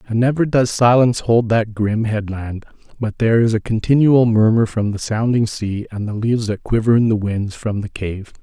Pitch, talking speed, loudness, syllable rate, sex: 110 Hz, 205 wpm, -17 LUFS, 5.1 syllables/s, male